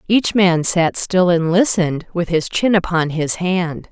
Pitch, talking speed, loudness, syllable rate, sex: 175 Hz, 185 wpm, -16 LUFS, 4.1 syllables/s, female